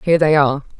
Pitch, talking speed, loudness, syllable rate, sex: 150 Hz, 230 wpm, -15 LUFS, 8.6 syllables/s, female